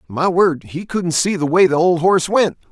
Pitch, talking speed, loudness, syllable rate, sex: 170 Hz, 245 wpm, -16 LUFS, 5.0 syllables/s, male